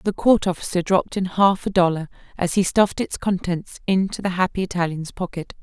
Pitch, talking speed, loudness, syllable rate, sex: 185 Hz, 190 wpm, -21 LUFS, 5.6 syllables/s, female